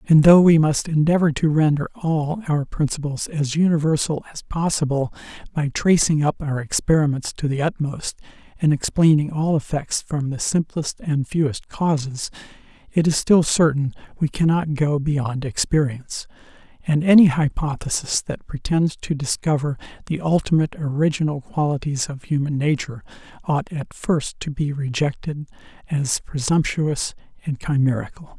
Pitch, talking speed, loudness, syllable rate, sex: 150 Hz, 135 wpm, -21 LUFS, 4.8 syllables/s, male